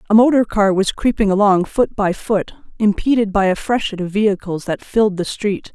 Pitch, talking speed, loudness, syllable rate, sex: 205 Hz, 200 wpm, -17 LUFS, 5.3 syllables/s, female